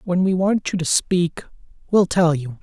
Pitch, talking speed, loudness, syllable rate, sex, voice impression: 175 Hz, 205 wpm, -19 LUFS, 4.3 syllables/s, male, masculine, very adult-like, middle-aged, slightly thick, relaxed, slightly weak, slightly dark, slightly soft, slightly muffled, slightly halting, slightly cool, intellectual, refreshing, very sincere, calm, slightly friendly, slightly reassuring, very unique, elegant, sweet, kind, very modest